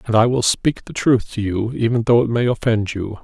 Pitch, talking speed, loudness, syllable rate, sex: 115 Hz, 260 wpm, -18 LUFS, 5.2 syllables/s, male